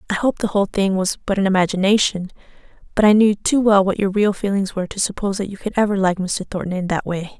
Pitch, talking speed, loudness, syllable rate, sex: 200 Hz, 250 wpm, -19 LUFS, 6.7 syllables/s, female